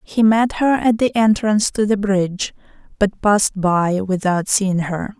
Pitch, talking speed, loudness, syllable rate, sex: 205 Hz, 175 wpm, -17 LUFS, 4.3 syllables/s, female